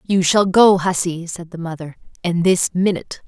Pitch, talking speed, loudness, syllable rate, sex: 175 Hz, 185 wpm, -17 LUFS, 4.9 syllables/s, female